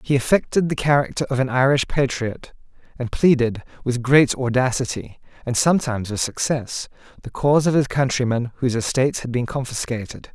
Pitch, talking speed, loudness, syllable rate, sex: 130 Hz, 155 wpm, -20 LUFS, 5.7 syllables/s, male